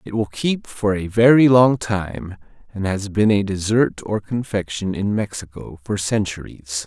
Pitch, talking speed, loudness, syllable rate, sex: 100 Hz, 165 wpm, -19 LUFS, 4.2 syllables/s, male